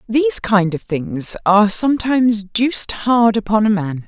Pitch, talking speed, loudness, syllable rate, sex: 215 Hz, 160 wpm, -16 LUFS, 4.7 syllables/s, female